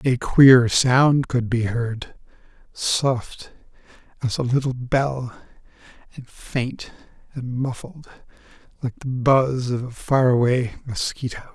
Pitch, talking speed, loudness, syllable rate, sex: 125 Hz, 120 wpm, -21 LUFS, 3.4 syllables/s, male